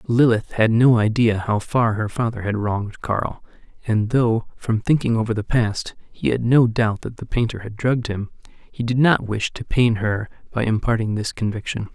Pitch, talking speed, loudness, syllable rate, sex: 115 Hz, 195 wpm, -21 LUFS, 4.8 syllables/s, male